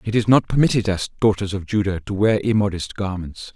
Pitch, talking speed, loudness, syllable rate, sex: 100 Hz, 200 wpm, -20 LUFS, 5.8 syllables/s, male